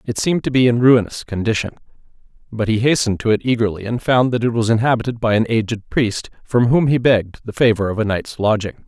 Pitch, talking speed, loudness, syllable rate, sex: 115 Hz, 225 wpm, -17 LUFS, 6.2 syllables/s, male